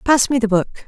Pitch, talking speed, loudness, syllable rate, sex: 230 Hz, 275 wpm, -17 LUFS, 5.2 syllables/s, female